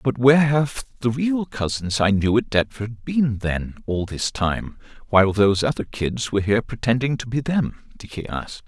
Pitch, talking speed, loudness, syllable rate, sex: 115 Hz, 175 wpm, -21 LUFS, 5.0 syllables/s, male